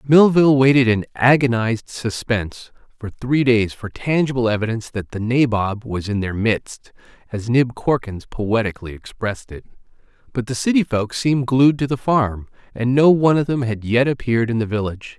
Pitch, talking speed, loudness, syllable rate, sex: 120 Hz, 175 wpm, -19 LUFS, 5.3 syllables/s, male